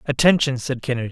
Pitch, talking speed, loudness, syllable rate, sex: 135 Hz, 160 wpm, -20 LUFS, 7.1 syllables/s, male